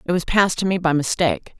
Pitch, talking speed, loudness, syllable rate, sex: 170 Hz, 265 wpm, -19 LUFS, 6.8 syllables/s, female